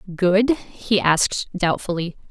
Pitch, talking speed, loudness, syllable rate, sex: 190 Hz, 105 wpm, -20 LUFS, 3.8 syllables/s, female